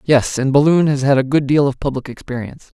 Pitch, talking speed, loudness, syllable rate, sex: 140 Hz, 235 wpm, -16 LUFS, 6.1 syllables/s, male